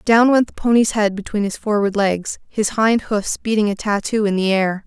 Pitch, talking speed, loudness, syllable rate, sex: 210 Hz, 220 wpm, -18 LUFS, 5.0 syllables/s, female